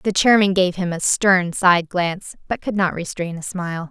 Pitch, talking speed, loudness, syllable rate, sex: 185 Hz, 215 wpm, -19 LUFS, 4.8 syllables/s, female